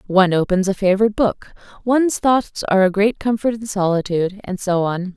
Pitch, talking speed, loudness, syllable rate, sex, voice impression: 200 Hz, 185 wpm, -18 LUFS, 5.9 syllables/s, female, feminine, adult-like, slightly powerful, bright, slightly soft, intellectual, friendly, unique, slightly elegant, slightly sweet, slightly strict, slightly intense, slightly sharp